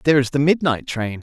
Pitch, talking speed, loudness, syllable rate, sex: 140 Hz, 245 wpm, -19 LUFS, 6.3 syllables/s, male